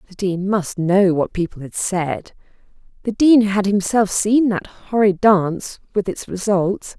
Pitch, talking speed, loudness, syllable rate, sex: 195 Hz, 165 wpm, -18 LUFS, 4.0 syllables/s, female